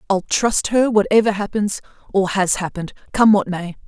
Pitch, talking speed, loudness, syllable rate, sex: 200 Hz, 170 wpm, -18 LUFS, 5.1 syllables/s, female